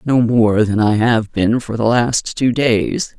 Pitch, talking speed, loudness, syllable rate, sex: 115 Hz, 205 wpm, -15 LUFS, 3.6 syllables/s, female